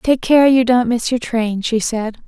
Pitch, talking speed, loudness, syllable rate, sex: 240 Hz, 235 wpm, -15 LUFS, 4.2 syllables/s, female